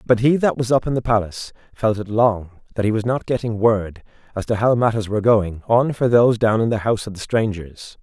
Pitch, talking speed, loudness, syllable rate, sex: 110 Hz, 245 wpm, -19 LUFS, 5.7 syllables/s, male